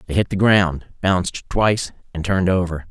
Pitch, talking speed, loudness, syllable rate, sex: 90 Hz, 185 wpm, -19 LUFS, 5.4 syllables/s, male